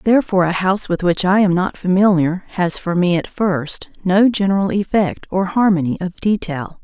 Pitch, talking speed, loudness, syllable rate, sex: 185 Hz, 185 wpm, -17 LUFS, 5.2 syllables/s, female